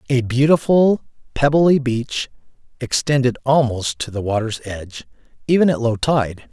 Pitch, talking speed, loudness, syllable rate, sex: 130 Hz, 130 wpm, -18 LUFS, 4.6 syllables/s, male